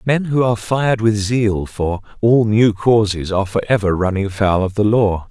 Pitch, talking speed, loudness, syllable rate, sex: 105 Hz, 190 wpm, -16 LUFS, 4.8 syllables/s, male